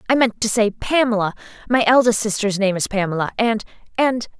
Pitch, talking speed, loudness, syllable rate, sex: 220 Hz, 165 wpm, -19 LUFS, 5.7 syllables/s, female